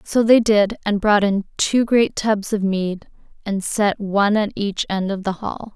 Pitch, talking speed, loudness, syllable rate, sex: 205 Hz, 210 wpm, -19 LUFS, 4.2 syllables/s, female